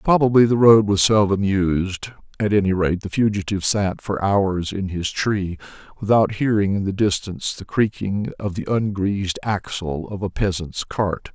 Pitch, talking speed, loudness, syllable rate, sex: 100 Hz, 170 wpm, -20 LUFS, 4.6 syllables/s, male